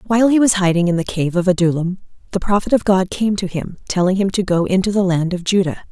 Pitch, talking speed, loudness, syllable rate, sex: 190 Hz, 255 wpm, -17 LUFS, 6.3 syllables/s, female